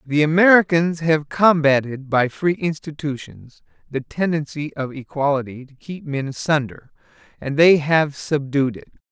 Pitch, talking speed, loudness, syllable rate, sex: 150 Hz, 130 wpm, -19 LUFS, 4.4 syllables/s, male